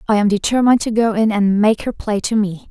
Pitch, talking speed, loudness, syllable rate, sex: 210 Hz, 265 wpm, -16 LUFS, 5.9 syllables/s, female